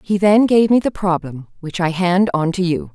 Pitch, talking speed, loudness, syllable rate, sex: 180 Hz, 245 wpm, -16 LUFS, 4.8 syllables/s, female